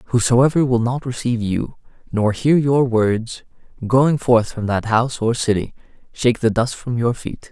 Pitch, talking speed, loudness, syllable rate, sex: 120 Hz, 175 wpm, -18 LUFS, 4.6 syllables/s, male